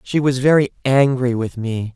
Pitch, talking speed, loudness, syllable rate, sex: 130 Hz, 185 wpm, -17 LUFS, 4.6 syllables/s, male